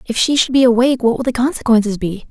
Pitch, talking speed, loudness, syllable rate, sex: 240 Hz, 260 wpm, -15 LUFS, 7.2 syllables/s, female